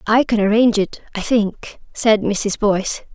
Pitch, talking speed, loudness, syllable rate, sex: 215 Hz, 170 wpm, -18 LUFS, 4.7 syllables/s, female